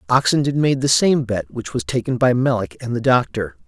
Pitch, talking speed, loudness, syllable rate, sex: 125 Hz, 210 wpm, -19 LUFS, 5.4 syllables/s, male